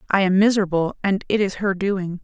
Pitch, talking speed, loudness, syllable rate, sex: 190 Hz, 215 wpm, -20 LUFS, 5.7 syllables/s, female